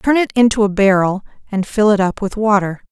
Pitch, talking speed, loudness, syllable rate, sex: 205 Hz, 225 wpm, -15 LUFS, 5.6 syllables/s, female